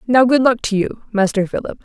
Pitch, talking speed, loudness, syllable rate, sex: 225 Hz, 230 wpm, -16 LUFS, 5.5 syllables/s, female